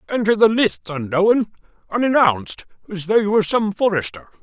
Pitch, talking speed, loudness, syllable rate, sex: 190 Hz, 150 wpm, -18 LUFS, 5.6 syllables/s, male